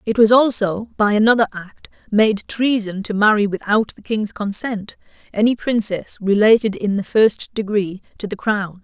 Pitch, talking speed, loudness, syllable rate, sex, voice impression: 210 Hz, 165 wpm, -18 LUFS, 4.6 syllables/s, female, feminine, adult-like, tensed, bright, soft, slightly raspy, intellectual, calm, slightly friendly, reassuring, kind, slightly modest